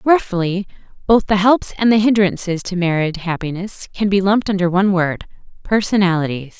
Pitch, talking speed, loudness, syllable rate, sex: 190 Hz, 145 wpm, -17 LUFS, 5.3 syllables/s, female